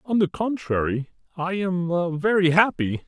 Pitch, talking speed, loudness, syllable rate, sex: 175 Hz, 135 wpm, -23 LUFS, 4.5 syllables/s, male